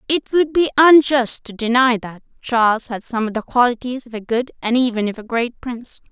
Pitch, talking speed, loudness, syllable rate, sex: 240 Hz, 215 wpm, -17 LUFS, 5.3 syllables/s, female